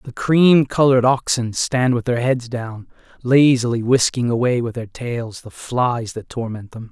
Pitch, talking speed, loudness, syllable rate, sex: 120 Hz, 175 wpm, -18 LUFS, 4.4 syllables/s, male